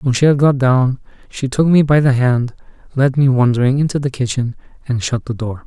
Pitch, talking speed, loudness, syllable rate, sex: 130 Hz, 225 wpm, -15 LUFS, 5.4 syllables/s, male